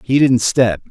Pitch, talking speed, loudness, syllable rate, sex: 120 Hz, 200 wpm, -14 LUFS, 4.1 syllables/s, male